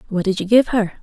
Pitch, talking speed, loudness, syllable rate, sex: 205 Hz, 290 wpm, -17 LUFS, 6.6 syllables/s, female